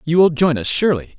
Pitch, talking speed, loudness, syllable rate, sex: 155 Hz, 255 wpm, -16 LUFS, 6.5 syllables/s, male